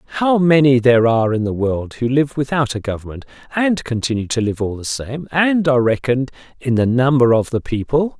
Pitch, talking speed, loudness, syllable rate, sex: 130 Hz, 205 wpm, -17 LUFS, 5.7 syllables/s, male